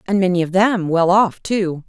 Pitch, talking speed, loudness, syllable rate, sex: 185 Hz, 225 wpm, -17 LUFS, 4.6 syllables/s, female